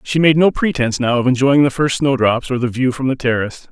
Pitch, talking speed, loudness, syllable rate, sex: 130 Hz, 260 wpm, -16 LUFS, 6.1 syllables/s, male